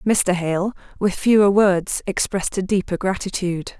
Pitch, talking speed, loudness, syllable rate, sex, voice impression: 190 Hz, 140 wpm, -20 LUFS, 4.7 syllables/s, female, feminine, adult-like, tensed, powerful, slightly bright, fluent, slightly raspy, intellectual, friendly, reassuring, elegant, lively, slightly kind